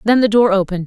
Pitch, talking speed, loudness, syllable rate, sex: 210 Hz, 280 wpm, -14 LUFS, 7.3 syllables/s, female